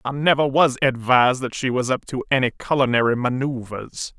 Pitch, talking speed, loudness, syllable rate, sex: 130 Hz, 170 wpm, -20 LUFS, 5.3 syllables/s, male